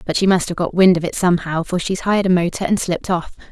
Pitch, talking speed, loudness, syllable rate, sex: 180 Hz, 290 wpm, -18 LUFS, 6.8 syllables/s, female